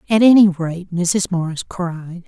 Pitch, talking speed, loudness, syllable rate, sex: 180 Hz, 160 wpm, -17 LUFS, 4.0 syllables/s, female